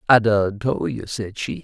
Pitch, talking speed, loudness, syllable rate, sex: 105 Hz, 220 wpm, -21 LUFS, 4.1 syllables/s, male